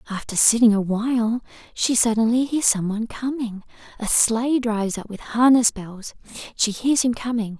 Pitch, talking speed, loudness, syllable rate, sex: 230 Hz, 160 wpm, -20 LUFS, 4.9 syllables/s, female